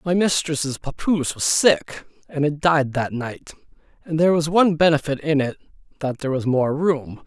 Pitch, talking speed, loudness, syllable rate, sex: 150 Hz, 175 wpm, -20 LUFS, 5.0 syllables/s, male